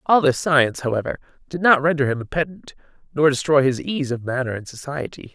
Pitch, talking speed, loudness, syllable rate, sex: 145 Hz, 200 wpm, -20 LUFS, 6.0 syllables/s, female